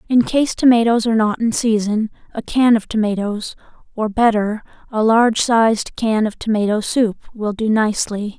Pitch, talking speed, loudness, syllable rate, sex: 220 Hz, 165 wpm, -17 LUFS, 5.0 syllables/s, female